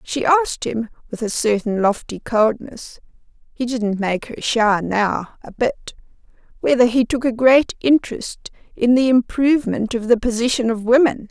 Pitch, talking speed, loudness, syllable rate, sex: 235 Hz, 150 wpm, -18 LUFS, 4.6 syllables/s, female